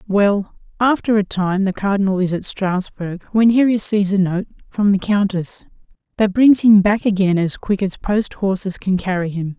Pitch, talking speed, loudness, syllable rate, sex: 195 Hz, 190 wpm, -17 LUFS, 4.8 syllables/s, female